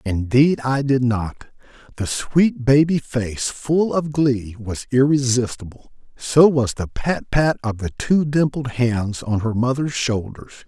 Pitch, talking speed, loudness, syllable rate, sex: 130 Hz, 150 wpm, -19 LUFS, 3.8 syllables/s, male